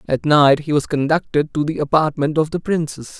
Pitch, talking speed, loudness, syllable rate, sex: 150 Hz, 205 wpm, -18 LUFS, 5.3 syllables/s, male